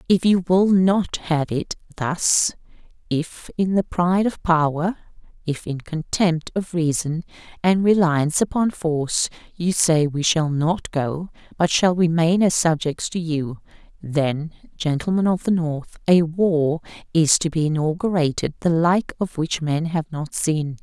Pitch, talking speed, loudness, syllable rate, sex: 165 Hz, 150 wpm, -21 LUFS, 4.1 syllables/s, female